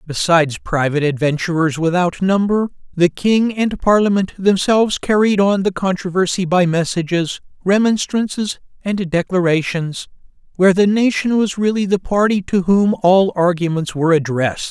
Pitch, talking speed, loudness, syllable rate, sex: 185 Hz, 130 wpm, -16 LUFS, 4.9 syllables/s, male